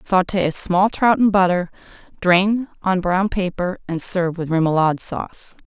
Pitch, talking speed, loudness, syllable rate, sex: 185 Hz, 160 wpm, -19 LUFS, 4.8 syllables/s, female